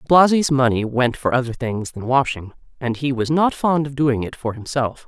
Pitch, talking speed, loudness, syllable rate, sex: 130 Hz, 215 wpm, -20 LUFS, 5.0 syllables/s, female